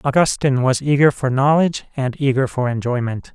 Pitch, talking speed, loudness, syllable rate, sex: 135 Hz, 160 wpm, -18 LUFS, 5.8 syllables/s, male